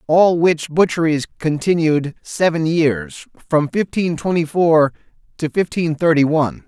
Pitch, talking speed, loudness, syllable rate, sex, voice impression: 160 Hz, 125 wpm, -17 LUFS, 4.3 syllables/s, male, masculine, adult-like, tensed, powerful, slightly bright, clear, slightly raspy, slightly mature, friendly, wild, lively, slightly strict, slightly intense